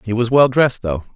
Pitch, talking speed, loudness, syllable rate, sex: 115 Hz, 260 wpm, -16 LUFS, 6.0 syllables/s, male